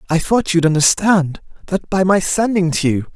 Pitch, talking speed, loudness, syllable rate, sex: 175 Hz, 190 wpm, -16 LUFS, 4.9 syllables/s, male